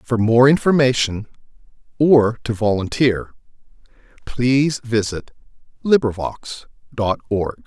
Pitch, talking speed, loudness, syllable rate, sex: 120 Hz, 85 wpm, -18 LUFS, 3.9 syllables/s, male